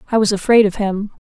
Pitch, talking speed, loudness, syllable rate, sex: 205 Hz, 235 wpm, -16 LUFS, 6.4 syllables/s, female